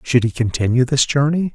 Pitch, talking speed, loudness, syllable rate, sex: 130 Hz, 195 wpm, -17 LUFS, 5.5 syllables/s, male